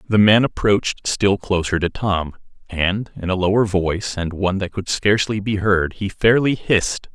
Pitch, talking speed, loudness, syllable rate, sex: 100 Hz, 185 wpm, -19 LUFS, 4.8 syllables/s, male